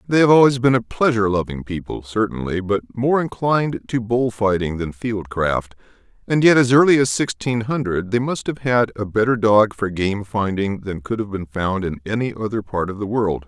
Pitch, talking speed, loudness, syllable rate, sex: 110 Hz, 210 wpm, -19 LUFS, 5.1 syllables/s, male